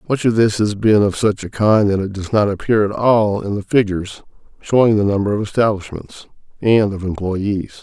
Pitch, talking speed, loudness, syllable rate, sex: 105 Hz, 205 wpm, -17 LUFS, 5.2 syllables/s, male